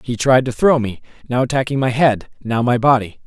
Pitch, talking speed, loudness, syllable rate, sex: 125 Hz, 220 wpm, -17 LUFS, 5.4 syllables/s, male